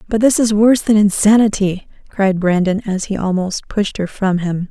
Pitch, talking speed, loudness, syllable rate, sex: 200 Hz, 190 wpm, -15 LUFS, 4.9 syllables/s, female